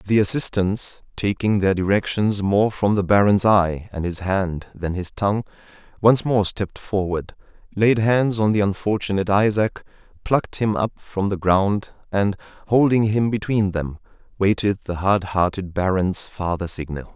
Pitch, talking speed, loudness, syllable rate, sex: 100 Hz, 155 wpm, -21 LUFS, 4.5 syllables/s, male